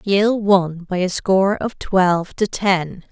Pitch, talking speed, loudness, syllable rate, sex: 190 Hz, 175 wpm, -18 LUFS, 3.7 syllables/s, female